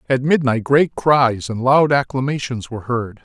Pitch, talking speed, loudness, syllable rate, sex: 130 Hz, 165 wpm, -17 LUFS, 4.6 syllables/s, male